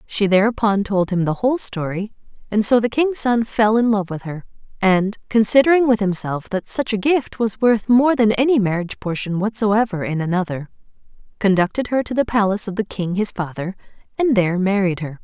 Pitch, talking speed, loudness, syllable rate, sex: 210 Hz, 195 wpm, -19 LUFS, 5.5 syllables/s, female